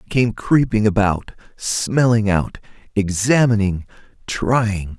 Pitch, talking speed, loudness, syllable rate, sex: 105 Hz, 95 wpm, -18 LUFS, 3.5 syllables/s, male